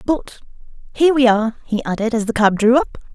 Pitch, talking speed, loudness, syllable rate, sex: 235 Hz, 210 wpm, -17 LUFS, 6.2 syllables/s, female